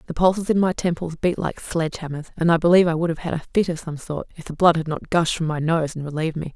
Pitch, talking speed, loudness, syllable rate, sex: 165 Hz, 300 wpm, -22 LUFS, 6.8 syllables/s, female